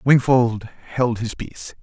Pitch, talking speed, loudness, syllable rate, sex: 120 Hz, 130 wpm, -20 LUFS, 4.0 syllables/s, male